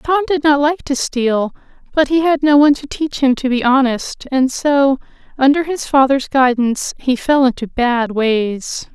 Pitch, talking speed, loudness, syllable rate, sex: 270 Hz, 190 wpm, -15 LUFS, 4.4 syllables/s, female